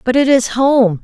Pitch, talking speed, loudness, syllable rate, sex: 245 Hz, 235 wpm, -13 LUFS, 4.3 syllables/s, female